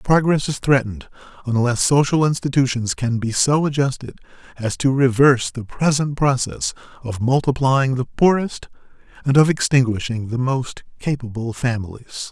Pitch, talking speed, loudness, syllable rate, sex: 130 Hz, 130 wpm, -19 LUFS, 4.9 syllables/s, male